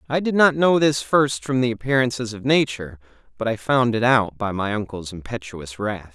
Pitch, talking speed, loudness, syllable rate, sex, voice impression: 120 Hz, 205 wpm, -21 LUFS, 5.2 syllables/s, male, masculine, adult-like, slightly clear, fluent, slightly cool, slightly intellectual, refreshing